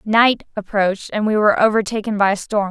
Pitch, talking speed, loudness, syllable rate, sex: 210 Hz, 200 wpm, -17 LUFS, 5.9 syllables/s, female